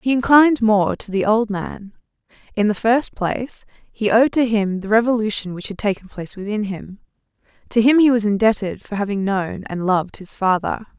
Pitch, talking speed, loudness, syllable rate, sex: 215 Hz, 190 wpm, -19 LUFS, 5.2 syllables/s, female